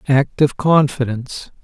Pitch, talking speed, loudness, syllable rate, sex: 135 Hz, 110 wpm, -17 LUFS, 4.3 syllables/s, male